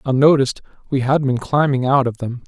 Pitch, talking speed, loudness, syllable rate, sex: 135 Hz, 195 wpm, -17 LUFS, 5.8 syllables/s, male